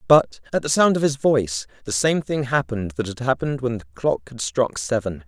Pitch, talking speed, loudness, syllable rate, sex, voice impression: 120 Hz, 230 wpm, -22 LUFS, 5.4 syllables/s, male, masculine, adult-like, slightly bright, soft, slightly raspy, slightly refreshing, calm, friendly, reassuring, wild, lively, kind, light